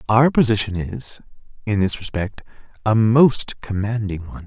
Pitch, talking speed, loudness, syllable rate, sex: 105 Hz, 135 wpm, -20 LUFS, 4.7 syllables/s, male